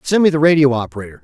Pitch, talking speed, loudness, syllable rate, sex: 145 Hz, 240 wpm, -14 LUFS, 8.0 syllables/s, male